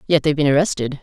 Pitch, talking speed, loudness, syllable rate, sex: 145 Hz, 235 wpm, -17 LUFS, 8.1 syllables/s, female